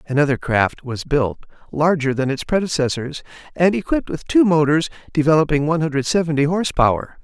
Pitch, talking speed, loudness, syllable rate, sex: 150 Hz, 160 wpm, -19 LUFS, 6.0 syllables/s, male